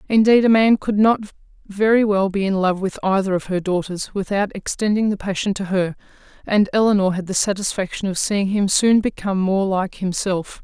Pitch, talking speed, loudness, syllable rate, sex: 200 Hz, 190 wpm, -19 LUFS, 5.2 syllables/s, female